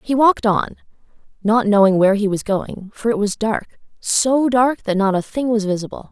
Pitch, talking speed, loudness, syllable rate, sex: 215 Hz, 205 wpm, -18 LUFS, 5.1 syllables/s, female